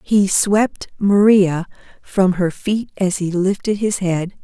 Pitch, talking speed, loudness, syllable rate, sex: 195 Hz, 150 wpm, -17 LUFS, 3.5 syllables/s, female